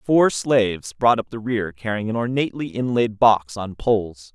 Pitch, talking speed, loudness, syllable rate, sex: 110 Hz, 180 wpm, -21 LUFS, 4.7 syllables/s, male